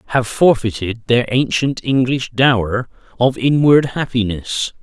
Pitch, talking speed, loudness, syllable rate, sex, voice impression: 125 Hz, 110 wpm, -16 LUFS, 4.1 syllables/s, male, very masculine, very adult-like, old, very thick, tensed, very powerful, bright, very hard, very clear, fluent, slightly raspy, very cool, very intellectual, very sincere, calm, very mature, slightly friendly, reassuring, very unique, very wild, very strict, sharp